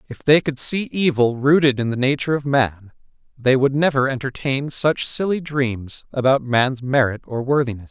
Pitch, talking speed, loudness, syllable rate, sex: 135 Hz, 175 wpm, -19 LUFS, 4.8 syllables/s, male